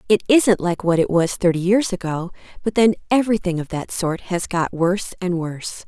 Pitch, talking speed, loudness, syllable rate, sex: 185 Hz, 205 wpm, -20 LUFS, 5.3 syllables/s, female